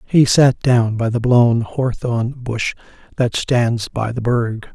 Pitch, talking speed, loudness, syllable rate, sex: 120 Hz, 165 wpm, -17 LUFS, 3.5 syllables/s, male